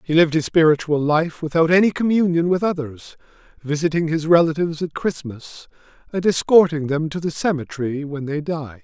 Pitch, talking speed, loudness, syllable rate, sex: 160 Hz, 165 wpm, -19 LUFS, 5.5 syllables/s, male